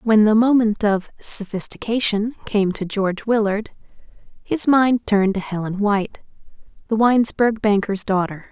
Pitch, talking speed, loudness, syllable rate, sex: 210 Hz, 135 wpm, -19 LUFS, 4.7 syllables/s, female